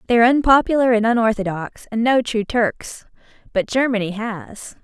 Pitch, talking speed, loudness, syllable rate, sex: 230 Hz, 150 wpm, -18 LUFS, 5.1 syllables/s, female